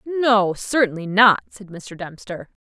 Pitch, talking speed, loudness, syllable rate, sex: 205 Hz, 135 wpm, -18 LUFS, 4.0 syllables/s, female